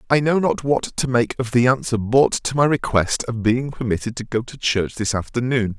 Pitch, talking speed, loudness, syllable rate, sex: 120 Hz, 230 wpm, -20 LUFS, 5.0 syllables/s, male